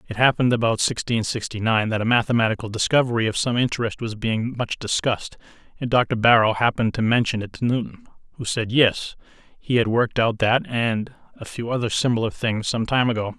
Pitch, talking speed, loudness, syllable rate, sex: 115 Hz, 195 wpm, -21 LUFS, 5.8 syllables/s, male